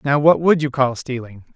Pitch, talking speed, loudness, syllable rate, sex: 135 Hz, 230 wpm, -17 LUFS, 5.0 syllables/s, male